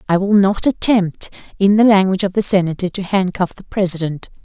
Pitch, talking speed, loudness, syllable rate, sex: 190 Hz, 190 wpm, -16 LUFS, 5.7 syllables/s, female